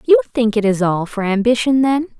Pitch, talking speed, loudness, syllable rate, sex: 225 Hz, 220 wpm, -16 LUFS, 5.3 syllables/s, female